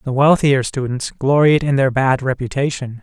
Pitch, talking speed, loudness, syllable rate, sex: 135 Hz, 160 wpm, -16 LUFS, 4.8 syllables/s, male